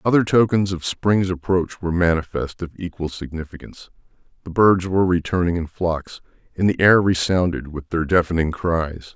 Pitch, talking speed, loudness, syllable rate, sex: 90 Hz, 155 wpm, -20 LUFS, 5.1 syllables/s, male